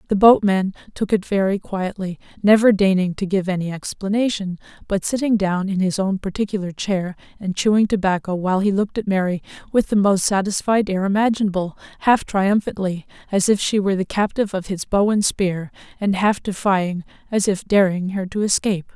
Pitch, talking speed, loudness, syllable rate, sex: 195 Hz, 175 wpm, -20 LUFS, 5.5 syllables/s, female